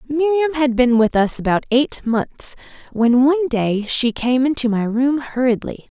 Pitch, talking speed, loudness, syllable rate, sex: 255 Hz, 170 wpm, -18 LUFS, 4.3 syllables/s, female